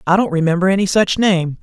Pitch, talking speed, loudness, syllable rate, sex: 185 Hz, 220 wpm, -15 LUFS, 6.1 syllables/s, male